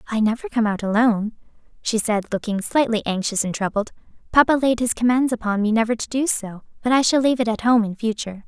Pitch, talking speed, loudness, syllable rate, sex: 225 Hz, 220 wpm, -20 LUFS, 6.3 syllables/s, female